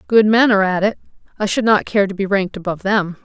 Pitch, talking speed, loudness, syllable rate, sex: 200 Hz, 260 wpm, -16 LUFS, 6.8 syllables/s, female